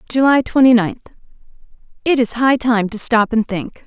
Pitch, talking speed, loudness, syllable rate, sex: 240 Hz, 155 wpm, -15 LUFS, 4.8 syllables/s, female